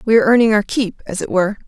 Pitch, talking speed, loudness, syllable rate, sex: 215 Hz, 285 wpm, -16 LUFS, 7.6 syllables/s, female